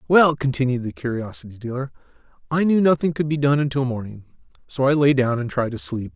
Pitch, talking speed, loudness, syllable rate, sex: 135 Hz, 205 wpm, -21 LUFS, 6.0 syllables/s, male